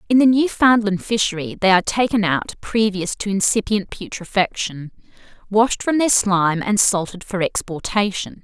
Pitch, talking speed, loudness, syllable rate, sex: 200 Hz, 140 wpm, -18 LUFS, 4.8 syllables/s, female